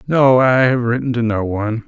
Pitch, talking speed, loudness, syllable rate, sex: 120 Hz, 225 wpm, -15 LUFS, 5.2 syllables/s, male